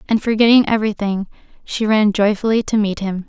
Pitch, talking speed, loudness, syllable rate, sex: 210 Hz, 165 wpm, -16 LUFS, 5.8 syllables/s, female